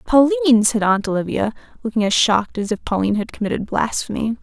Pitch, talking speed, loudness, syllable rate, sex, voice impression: 220 Hz, 175 wpm, -18 LUFS, 6.7 syllables/s, female, feminine, adult-like, slightly muffled, calm, slightly kind